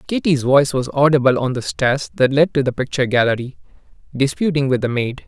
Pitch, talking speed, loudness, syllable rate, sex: 135 Hz, 195 wpm, -17 LUFS, 6.0 syllables/s, male